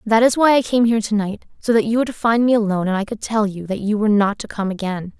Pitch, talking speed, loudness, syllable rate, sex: 215 Hz, 290 wpm, -18 LUFS, 6.5 syllables/s, female